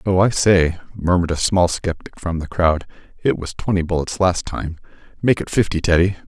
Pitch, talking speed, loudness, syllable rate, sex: 90 Hz, 190 wpm, -19 LUFS, 5.3 syllables/s, male